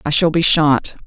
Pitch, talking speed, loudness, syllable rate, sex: 155 Hz, 225 wpm, -14 LUFS, 4.5 syllables/s, female